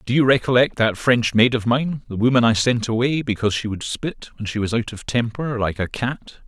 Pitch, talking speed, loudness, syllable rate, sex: 120 Hz, 230 wpm, -20 LUFS, 5.3 syllables/s, male